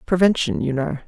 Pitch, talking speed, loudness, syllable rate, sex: 160 Hz, 165 wpm, -20 LUFS, 5.3 syllables/s, male